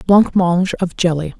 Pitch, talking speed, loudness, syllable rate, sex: 175 Hz, 130 wpm, -16 LUFS, 4.9 syllables/s, female